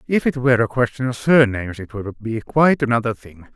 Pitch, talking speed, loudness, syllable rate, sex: 120 Hz, 220 wpm, -19 LUFS, 6.1 syllables/s, male